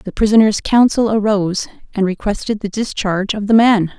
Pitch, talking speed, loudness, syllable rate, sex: 210 Hz, 165 wpm, -15 LUFS, 5.5 syllables/s, female